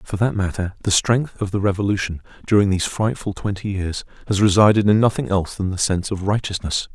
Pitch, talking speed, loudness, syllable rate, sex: 100 Hz, 200 wpm, -20 LUFS, 6.1 syllables/s, male